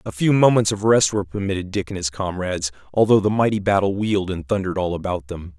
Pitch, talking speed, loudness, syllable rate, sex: 95 Hz, 225 wpm, -20 LUFS, 6.5 syllables/s, male